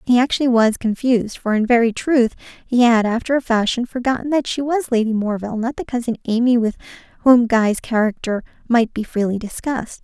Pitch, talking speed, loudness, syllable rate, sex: 235 Hz, 185 wpm, -18 LUFS, 5.7 syllables/s, female